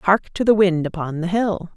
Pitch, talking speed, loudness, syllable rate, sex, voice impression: 185 Hz, 240 wpm, -19 LUFS, 5.4 syllables/s, female, feminine, adult-like, tensed, powerful, slightly hard, clear, fluent, intellectual, calm, slightly friendly, lively, sharp